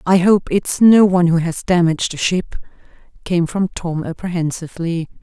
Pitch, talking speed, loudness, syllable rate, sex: 175 Hz, 160 wpm, -16 LUFS, 5.1 syllables/s, female